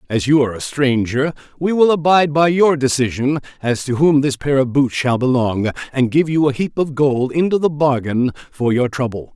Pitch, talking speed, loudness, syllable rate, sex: 140 Hz, 210 wpm, -17 LUFS, 5.2 syllables/s, male